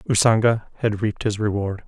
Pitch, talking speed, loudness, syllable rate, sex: 110 Hz, 160 wpm, -21 LUFS, 5.7 syllables/s, male